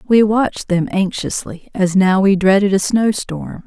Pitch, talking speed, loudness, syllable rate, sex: 195 Hz, 180 wpm, -16 LUFS, 4.3 syllables/s, female